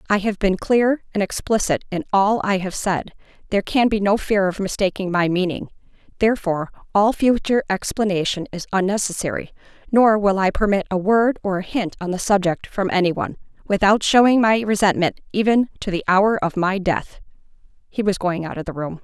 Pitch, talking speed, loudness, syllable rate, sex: 195 Hz, 185 wpm, -20 LUFS, 5.5 syllables/s, female